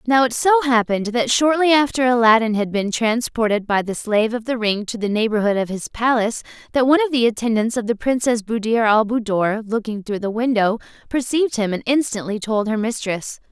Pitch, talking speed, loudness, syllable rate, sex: 230 Hz, 200 wpm, -19 LUFS, 5.7 syllables/s, female